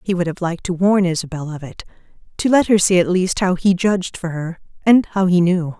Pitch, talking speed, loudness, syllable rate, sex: 180 Hz, 240 wpm, -17 LUFS, 5.7 syllables/s, female